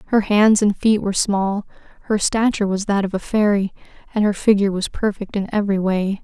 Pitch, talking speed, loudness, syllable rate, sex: 205 Hz, 200 wpm, -19 LUFS, 5.8 syllables/s, female